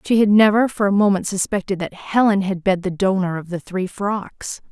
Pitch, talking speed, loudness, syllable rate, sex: 195 Hz, 215 wpm, -19 LUFS, 5.1 syllables/s, female